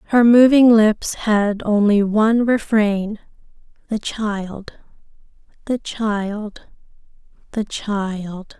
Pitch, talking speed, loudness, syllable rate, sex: 215 Hz, 90 wpm, -18 LUFS, 2.9 syllables/s, female